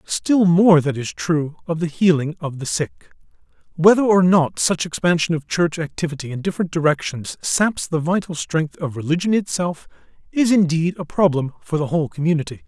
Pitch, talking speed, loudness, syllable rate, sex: 165 Hz, 175 wpm, -19 LUFS, 5.2 syllables/s, male